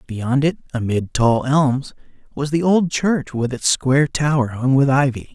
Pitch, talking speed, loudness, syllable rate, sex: 135 Hz, 180 wpm, -18 LUFS, 4.3 syllables/s, male